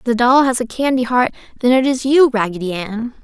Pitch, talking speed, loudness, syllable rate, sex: 245 Hz, 240 wpm, -16 LUFS, 5.7 syllables/s, female